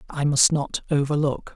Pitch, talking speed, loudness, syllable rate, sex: 145 Hz, 155 wpm, -22 LUFS, 4.6 syllables/s, male